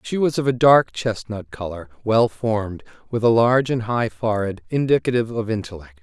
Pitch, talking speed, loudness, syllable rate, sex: 110 Hz, 180 wpm, -20 LUFS, 5.5 syllables/s, male